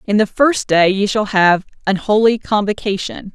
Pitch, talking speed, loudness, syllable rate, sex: 205 Hz, 180 wpm, -15 LUFS, 4.6 syllables/s, female